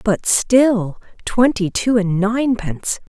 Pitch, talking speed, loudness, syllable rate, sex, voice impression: 215 Hz, 95 wpm, -17 LUFS, 3.8 syllables/s, female, feminine, adult-like, bright, soft, fluent, intellectual, calm, friendly, reassuring, elegant, lively, kind